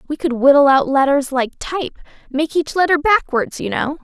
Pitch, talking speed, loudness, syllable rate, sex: 295 Hz, 180 wpm, -16 LUFS, 5.1 syllables/s, female